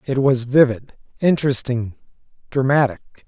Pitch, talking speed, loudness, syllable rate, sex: 130 Hz, 90 wpm, -18 LUFS, 5.0 syllables/s, male